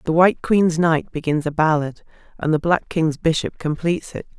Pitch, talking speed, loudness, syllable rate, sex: 160 Hz, 190 wpm, -20 LUFS, 5.2 syllables/s, female